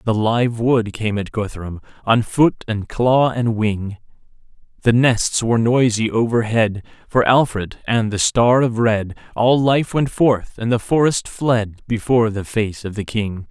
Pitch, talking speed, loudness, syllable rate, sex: 115 Hz, 170 wpm, -18 LUFS, 4.1 syllables/s, male